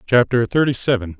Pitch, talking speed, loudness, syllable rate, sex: 115 Hz, 150 wpm, -18 LUFS, 5.7 syllables/s, male